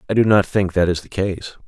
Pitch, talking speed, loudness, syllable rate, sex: 95 Hz, 285 wpm, -18 LUFS, 5.9 syllables/s, male